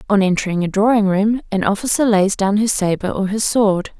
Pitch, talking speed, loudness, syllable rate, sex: 205 Hz, 210 wpm, -17 LUFS, 5.4 syllables/s, female